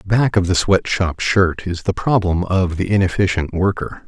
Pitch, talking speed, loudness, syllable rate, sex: 95 Hz, 190 wpm, -18 LUFS, 4.6 syllables/s, male